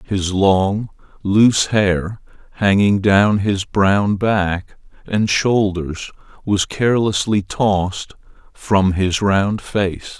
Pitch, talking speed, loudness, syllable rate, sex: 100 Hz, 105 wpm, -17 LUFS, 3.0 syllables/s, male